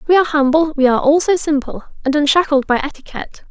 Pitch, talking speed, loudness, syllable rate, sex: 295 Hz, 205 wpm, -15 LUFS, 6.9 syllables/s, female